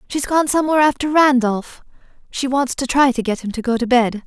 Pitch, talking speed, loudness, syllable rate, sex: 260 Hz, 225 wpm, -17 LUFS, 5.9 syllables/s, female